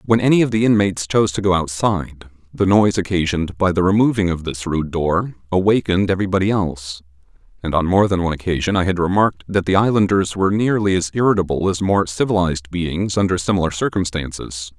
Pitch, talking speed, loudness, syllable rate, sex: 90 Hz, 185 wpm, -18 LUFS, 6.3 syllables/s, male